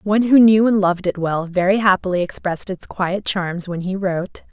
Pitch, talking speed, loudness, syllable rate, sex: 190 Hz, 210 wpm, -18 LUFS, 5.4 syllables/s, female